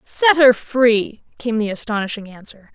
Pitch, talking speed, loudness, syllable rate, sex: 230 Hz, 155 wpm, -17 LUFS, 4.4 syllables/s, female